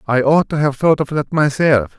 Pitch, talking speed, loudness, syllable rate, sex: 140 Hz, 240 wpm, -15 LUFS, 5.1 syllables/s, male